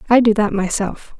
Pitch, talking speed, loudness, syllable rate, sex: 215 Hz, 200 wpm, -17 LUFS, 5.1 syllables/s, female